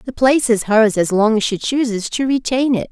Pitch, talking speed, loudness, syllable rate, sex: 235 Hz, 245 wpm, -16 LUFS, 5.4 syllables/s, female